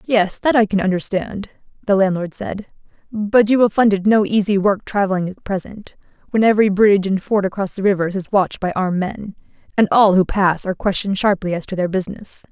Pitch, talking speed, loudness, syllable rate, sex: 200 Hz, 205 wpm, -17 LUFS, 5.8 syllables/s, female